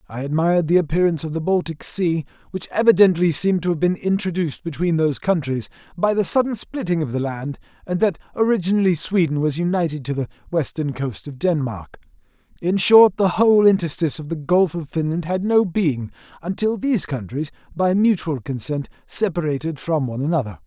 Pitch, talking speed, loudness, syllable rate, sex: 165 Hz, 175 wpm, -20 LUFS, 5.7 syllables/s, male